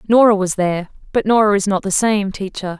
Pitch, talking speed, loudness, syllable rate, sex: 200 Hz, 195 wpm, -17 LUFS, 5.9 syllables/s, female